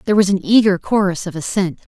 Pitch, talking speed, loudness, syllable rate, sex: 190 Hz, 215 wpm, -17 LUFS, 6.4 syllables/s, female